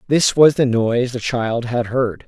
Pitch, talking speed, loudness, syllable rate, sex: 125 Hz, 210 wpm, -17 LUFS, 4.4 syllables/s, male